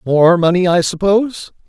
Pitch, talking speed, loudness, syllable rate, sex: 180 Hz, 145 wpm, -13 LUFS, 4.9 syllables/s, male